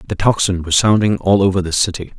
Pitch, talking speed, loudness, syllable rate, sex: 95 Hz, 220 wpm, -15 LUFS, 6.1 syllables/s, male